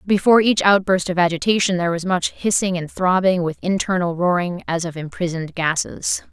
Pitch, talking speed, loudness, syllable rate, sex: 180 Hz, 170 wpm, -19 LUFS, 5.6 syllables/s, female